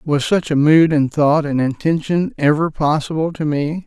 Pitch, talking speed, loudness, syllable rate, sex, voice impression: 150 Hz, 185 wpm, -16 LUFS, 4.5 syllables/s, male, very masculine, very adult-like, slightly old, very thick, slightly relaxed, powerful, dark, soft, slightly muffled, fluent, slightly raspy, cool, intellectual, sincere, calm, very mature, friendly, reassuring, unique, slightly elegant, wild, slightly sweet, lively, kind, slightly modest